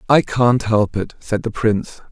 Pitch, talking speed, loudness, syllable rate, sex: 115 Hz, 200 wpm, -18 LUFS, 4.4 syllables/s, male